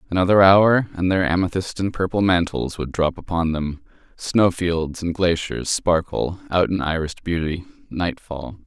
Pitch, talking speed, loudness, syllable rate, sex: 85 Hz, 145 wpm, -20 LUFS, 4.6 syllables/s, male